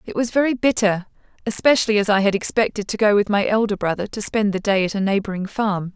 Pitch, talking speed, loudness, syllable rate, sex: 205 Hz, 230 wpm, -19 LUFS, 6.2 syllables/s, female